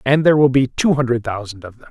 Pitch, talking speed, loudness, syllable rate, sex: 130 Hz, 285 wpm, -16 LUFS, 6.6 syllables/s, male